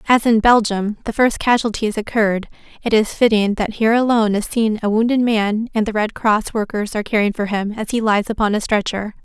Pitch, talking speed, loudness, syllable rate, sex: 215 Hz, 215 wpm, -17 LUFS, 5.7 syllables/s, female